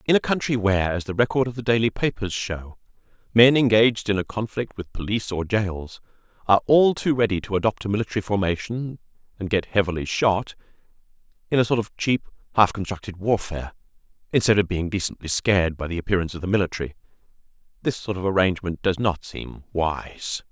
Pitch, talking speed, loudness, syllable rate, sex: 100 Hz, 180 wpm, -23 LUFS, 6.1 syllables/s, male